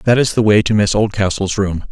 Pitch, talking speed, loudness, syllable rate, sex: 105 Hz, 250 wpm, -15 LUFS, 5.4 syllables/s, male